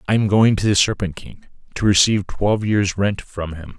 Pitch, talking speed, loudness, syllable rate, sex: 100 Hz, 220 wpm, -18 LUFS, 5.3 syllables/s, male